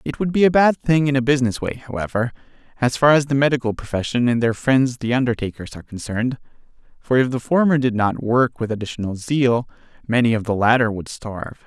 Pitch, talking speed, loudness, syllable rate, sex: 125 Hz, 205 wpm, -19 LUFS, 6.1 syllables/s, male